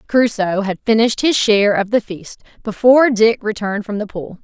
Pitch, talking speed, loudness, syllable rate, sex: 215 Hz, 190 wpm, -15 LUFS, 5.6 syllables/s, female